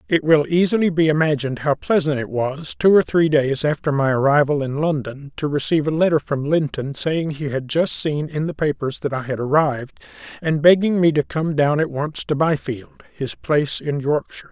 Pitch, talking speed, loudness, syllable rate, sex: 150 Hz, 205 wpm, -19 LUFS, 5.3 syllables/s, male